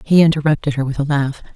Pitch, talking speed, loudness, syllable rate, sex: 145 Hz, 230 wpm, -17 LUFS, 6.7 syllables/s, female